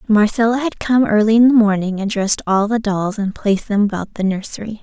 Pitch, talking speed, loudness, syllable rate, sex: 215 Hz, 225 wpm, -16 LUFS, 5.8 syllables/s, female